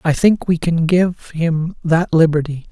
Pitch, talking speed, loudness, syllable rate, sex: 165 Hz, 175 wpm, -16 LUFS, 4.0 syllables/s, male